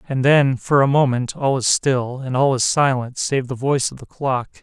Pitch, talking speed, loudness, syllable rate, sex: 130 Hz, 235 wpm, -19 LUFS, 4.9 syllables/s, male